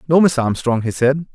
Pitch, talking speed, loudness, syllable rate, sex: 135 Hz, 225 wpm, -17 LUFS, 5.4 syllables/s, male